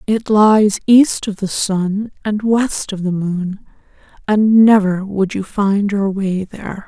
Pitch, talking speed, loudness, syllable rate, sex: 200 Hz, 165 wpm, -15 LUFS, 3.6 syllables/s, female